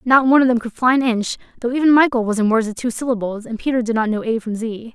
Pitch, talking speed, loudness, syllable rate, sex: 235 Hz, 305 wpm, -18 LUFS, 6.7 syllables/s, female